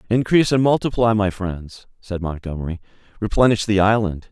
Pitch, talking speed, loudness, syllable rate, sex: 105 Hz, 140 wpm, -19 LUFS, 5.6 syllables/s, male